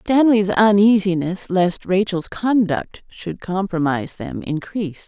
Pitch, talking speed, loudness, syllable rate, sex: 190 Hz, 105 wpm, -19 LUFS, 4.0 syllables/s, female